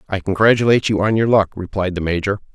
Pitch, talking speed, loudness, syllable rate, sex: 100 Hz, 210 wpm, -17 LUFS, 6.7 syllables/s, male